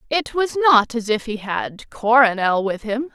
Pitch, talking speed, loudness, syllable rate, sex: 240 Hz, 190 wpm, -19 LUFS, 4.2 syllables/s, female